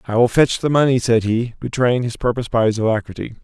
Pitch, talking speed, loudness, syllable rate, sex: 120 Hz, 225 wpm, -18 LUFS, 6.3 syllables/s, male